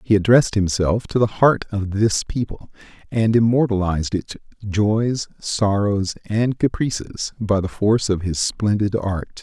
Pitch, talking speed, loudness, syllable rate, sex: 105 Hz, 145 wpm, -20 LUFS, 4.4 syllables/s, male